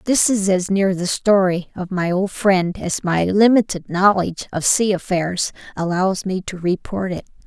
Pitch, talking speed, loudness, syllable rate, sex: 190 Hz, 175 wpm, -19 LUFS, 4.4 syllables/s, female